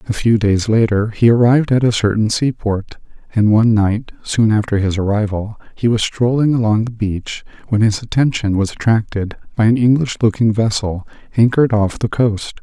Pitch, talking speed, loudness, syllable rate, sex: 110 Hz, 175 wpm, -16 LUFS, 5.2 syllables/s, male